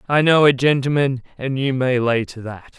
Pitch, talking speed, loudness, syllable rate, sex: 135 Hz, 215 wpm, -18 LUFS, 4.9 syllables/s, female